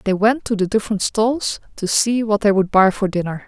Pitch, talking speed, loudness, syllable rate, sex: 205 Hz, 240 wpm, -18 LUFS, 5.2 syllables/s, female